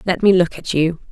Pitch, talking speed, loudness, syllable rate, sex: 175 Hz, 270 wpm, -17 LUFS, 5.6 syllables/s, female